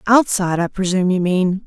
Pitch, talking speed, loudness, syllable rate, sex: 190 Hz, 180 wpm, -17 LUFS, 5.9 syllables/s, female